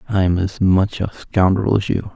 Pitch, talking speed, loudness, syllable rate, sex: 95 Hz, 225 wpm, -18 LUFS, 4.5 syllables/s, male